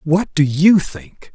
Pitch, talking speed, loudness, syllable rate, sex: 160 Hz, 180 wpm, -15 LUFS, 3.2 syllables/s, male